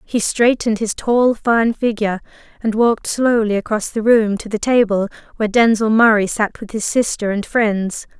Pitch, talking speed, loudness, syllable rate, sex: 220 Hz, 175 wpm, -17 LUFS, 4.9 syllables/s, female